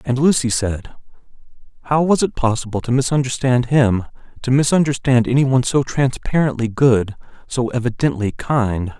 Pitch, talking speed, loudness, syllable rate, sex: 125 Hz, 135 wpm, -18 LUFS, 5.1 syllables/s, male